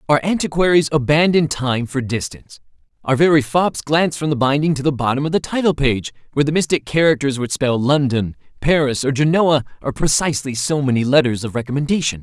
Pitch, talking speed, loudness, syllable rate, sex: 145 Hz, 180 wpm, -17 LUFS, 6.0 syllables/s, male